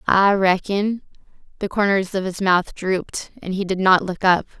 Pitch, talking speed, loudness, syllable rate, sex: 190 Hz, 185 wpm, -20 LUFS, 4.6 syllables/s, female